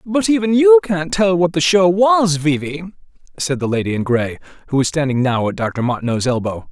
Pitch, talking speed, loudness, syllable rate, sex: 160 Hz, 215 wpm, -16 LUFS, 5.3 syllables/s, male